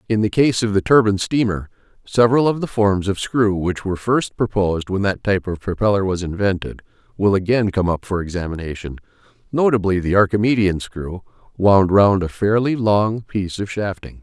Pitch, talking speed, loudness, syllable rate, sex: 100 Hz, 175 wpm, -18 LUFS, 5.4 syllables/s, male